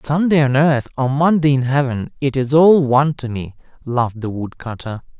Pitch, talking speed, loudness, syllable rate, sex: 135 Hz, 195 wpm, -16 LUFS, 5.1 syllables/s, male